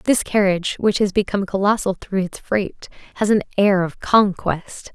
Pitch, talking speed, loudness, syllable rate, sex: 195 Hz, 170 wpm, -19 LUFS, 4.7 syllables/s, female